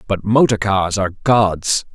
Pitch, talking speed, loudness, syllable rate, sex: 100 Hz, 155 wpm, -16 LUFS, 4.3 syllables/s, male